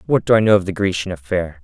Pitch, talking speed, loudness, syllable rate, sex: 90 Hz, 295 wpm, -17 LUFS, 7.0 syllables/s, male